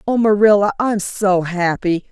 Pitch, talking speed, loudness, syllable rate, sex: 200 Hz, 140 wpm, -16 LUFS, 4.2 syllables/s, female